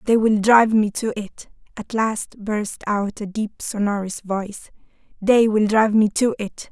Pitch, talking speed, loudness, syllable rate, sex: 210 Hz, 180 wpm, -20 LUFS, 4.4 syllables/s, female